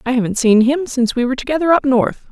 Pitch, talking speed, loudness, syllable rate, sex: 260 Hz, 260 wpm, -15 LUFS, 6.9 syllables/s, female